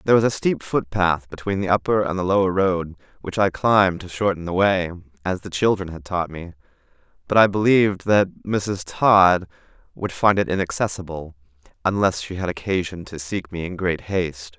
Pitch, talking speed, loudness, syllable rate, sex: 90 Hz, 185 wpm, -21 LUFS, 5.2 syllables/s, male